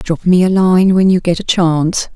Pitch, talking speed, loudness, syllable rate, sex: 180 Hz, 250 wpm, -12 LUFS, 4.8 syllables/s, female